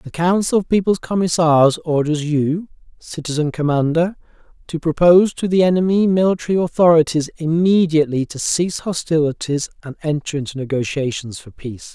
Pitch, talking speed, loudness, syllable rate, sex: 160 Hz, 130 wpm, -17 LUFS, 5.4 syllables/s, male